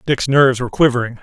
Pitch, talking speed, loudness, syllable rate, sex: 130 Hz, 195 wpm, -15 LUFS, 7.2 syllables/s, male